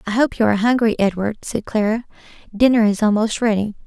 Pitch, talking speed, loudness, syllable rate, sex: 220 Hz, 185 wpm, -18 LUFS, 6.0 syllables/s, female